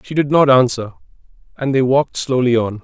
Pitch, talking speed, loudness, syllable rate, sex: 130 Hz, 190 wpm, -15 LUFS, 5.7 syllables/s, male